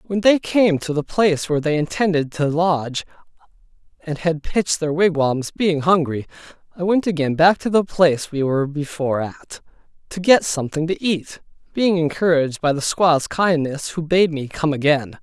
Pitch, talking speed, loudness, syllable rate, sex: 160 Hz, 175 wpm, -19 LUFS, 5.1 syllables/s, male